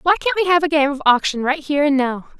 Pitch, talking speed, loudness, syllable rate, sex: 295 Hz, 300 wpm, -17 LUFS, 7.0 syllables/s, female